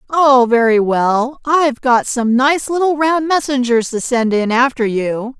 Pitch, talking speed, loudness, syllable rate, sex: 255 Hz, 165 wpm, -14 LUFS, 4.1 syllables/s, female